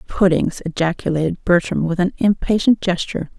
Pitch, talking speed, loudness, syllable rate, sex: 180 Hz, 125 wpm, -18 LUFS, 5.6 syllables/s, female